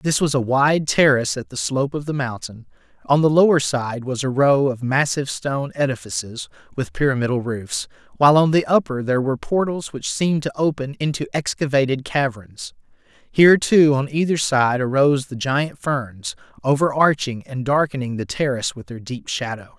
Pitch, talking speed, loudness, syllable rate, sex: 135 Hz, 175 wpm, -20 LUFS, 5.3 syllables/s, male